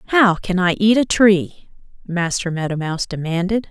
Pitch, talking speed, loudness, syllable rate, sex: 190 Hz, 160 wpm, -18 LUFS, 5.0 syllables/s, female